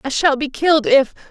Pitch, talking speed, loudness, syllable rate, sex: 285 Hz, 230 wpm, -16 LUFS, 5.6 syllables/s, female